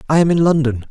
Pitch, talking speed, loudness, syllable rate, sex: 145 Hz, 265 wpm, -15 LUFS, 7.0 syllables/s, male